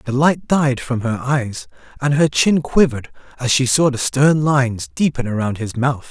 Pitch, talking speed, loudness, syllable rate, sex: 130 Hz, 195 wpm, -17 LUFS, 4.7 syllables/s, male